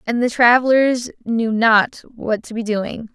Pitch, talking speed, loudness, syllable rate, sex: 230 Hz, 170 wpm, -17 LUFS, 4.0 syllables/s, female